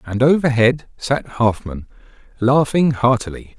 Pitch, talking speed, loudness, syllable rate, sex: 125 Hz, 100 wpm, -17 LUFS, 4.2 syllables/s, male